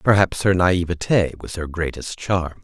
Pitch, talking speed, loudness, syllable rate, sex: 90 Hz, 160 wpm, -21 LUFS, 4.5 syllables/s, male